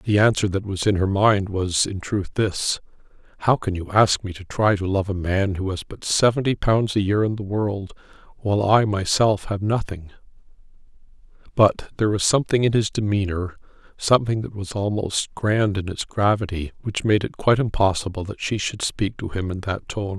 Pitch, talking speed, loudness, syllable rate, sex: 100 Hz, 190 wpm, -22 LUFS, 5.1 syllables/s, male